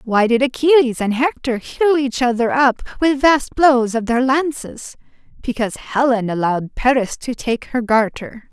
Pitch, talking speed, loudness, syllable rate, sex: 250 Hz, 160 wpm, -17 LUFS, 4.5 syllables/s, female